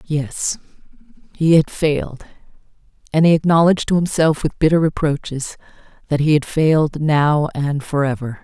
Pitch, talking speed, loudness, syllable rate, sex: 150 Hz, 140 wpm, -17 LUFS, 4.9 syllables/s, female